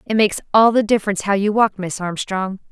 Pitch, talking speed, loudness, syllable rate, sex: 205 Hz, 220 wpm, -18 LUFS, 6.3 syllables/s, female